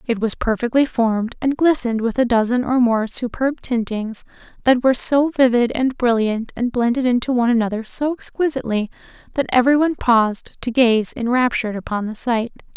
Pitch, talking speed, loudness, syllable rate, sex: 240 Hz, 170 wpm, -19 LUFS, 5.6 syllables/s, female